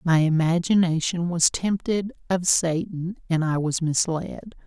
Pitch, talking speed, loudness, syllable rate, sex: 170 Hz, 130 wpm, -23 LUFS, 4.1 syllables/s, female